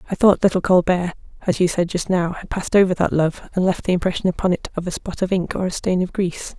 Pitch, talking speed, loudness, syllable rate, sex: 180 Hz, 275 wpm, -20 LUFS, 6.4 syllables/s, female